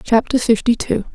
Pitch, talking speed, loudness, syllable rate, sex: 230 Hz, 155 wpm, -17 LUFS, 5.2 syllables/s, female